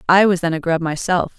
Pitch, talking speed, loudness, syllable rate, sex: 170 Hz, 260 wpm, -18 LUFS, 5.7 syllables/s, female